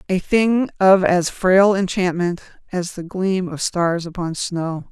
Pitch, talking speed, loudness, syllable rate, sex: 180 Hz, 160 wpm, -19 LUFS, 3.7 syllables/s, female